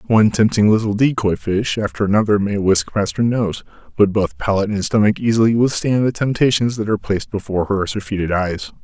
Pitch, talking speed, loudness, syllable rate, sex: 105 Hz, 190 wpm, -17 LUFS, 6.0 syllables/s, male